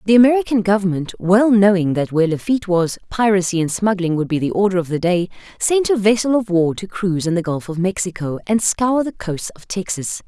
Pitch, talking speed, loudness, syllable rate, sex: 195 Hz, 215 wpm, -18 LUFS, 5.7 syllables/s, female